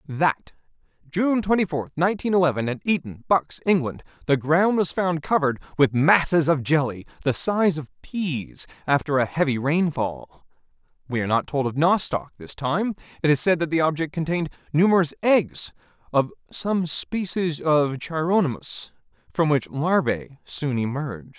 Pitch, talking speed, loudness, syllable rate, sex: 150 Hz, 150 wpm, -23 LUFS, 4.7 syllables/s, male